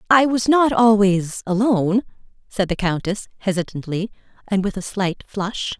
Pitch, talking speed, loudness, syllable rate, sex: 200 Hz, 145 wpm, -20 LUFS, 4.8 syllables/s, female